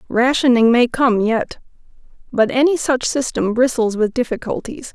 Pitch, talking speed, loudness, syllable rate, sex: 245 Hz, 135 wpm, -17 LUFS, 4.7 syllables/s, female